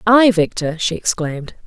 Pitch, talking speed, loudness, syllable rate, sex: 185 Hz, 145 wpm, -17 LUFS, 4.8 syllables/s, female